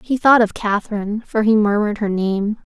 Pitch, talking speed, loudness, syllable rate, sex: 215 Hz, 195 wpm, -18 LUFS, 5.5 syllables/s, female